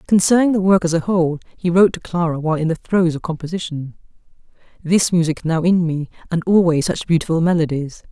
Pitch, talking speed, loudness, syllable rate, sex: 170 Hz, 190 wpm, -18 LUFS, 6.1 syllables/s, female